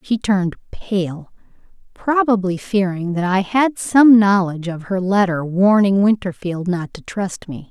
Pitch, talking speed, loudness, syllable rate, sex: 195 Hz, 140 wpm, -17 LUFS, 4.2 syllables/s, female